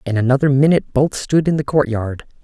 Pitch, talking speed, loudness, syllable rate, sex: 135 Hz, 195 wpm, -16 LUFS, 6.0 syllables/s, male